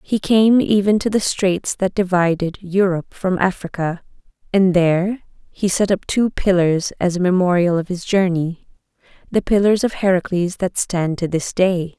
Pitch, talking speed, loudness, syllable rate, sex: 185 Hz, 160 wpm, -18 LUFS, 4.6 syllables/s, female